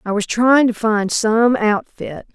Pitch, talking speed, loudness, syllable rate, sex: 220 Hz, 180 wpm, -16 LUFS, 3.7 syllables/s, female